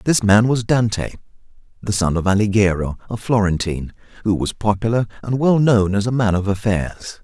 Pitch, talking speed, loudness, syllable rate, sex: 105 Hz, 175 wpm, -18 LUFS, 5.3 syllables/s, male